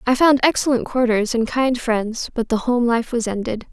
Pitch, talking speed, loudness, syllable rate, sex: 240 Hz, 210 wpm, -19 LUFS, 4.9 syllables/s, female